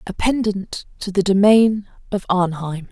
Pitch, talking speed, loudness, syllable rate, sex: 195 Hz, 145 wpm, -18 LUFS, 4.2 syllables/s, female